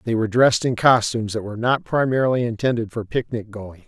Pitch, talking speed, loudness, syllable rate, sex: 115 Hz, 200 wpm, -20 LUFS, 6.4 syllables/s, male